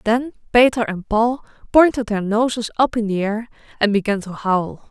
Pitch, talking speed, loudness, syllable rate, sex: 220 Hz, 185 wpm, -19 LUFS, 4.8 syllables/s, female